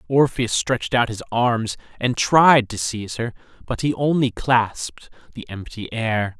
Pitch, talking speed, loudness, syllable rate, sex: 115 Hz, 160 wpm, -20 LUFS, 4.3 syllables/s, male